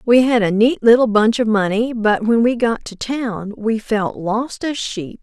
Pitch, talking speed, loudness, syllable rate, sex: 225 Hz, 220 wpm, -17 LUFS, 4.2 syllables/s, female